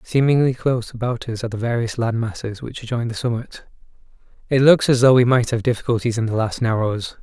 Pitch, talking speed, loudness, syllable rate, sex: 120 Hz, 210 wpm, -19 LUFS, 6.0 syllables/s, male